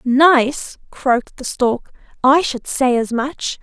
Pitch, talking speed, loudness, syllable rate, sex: 260 Hz, 150 wpm, -17 LUFS, 3.3 syllables/s, female